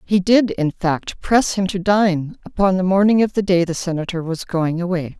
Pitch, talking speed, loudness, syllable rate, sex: 185 Hz, 220 wpm, -18 LUFS, 4.8 syllables/s, female